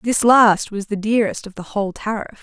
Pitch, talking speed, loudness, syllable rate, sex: 210 Hz, 220 wpm, -18 LUFS, 5.9 syllables/s, female